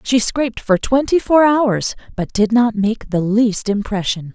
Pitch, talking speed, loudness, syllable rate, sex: 225 Hz, 180 wpm, -16 LUFS, 4.2 syllables/s, female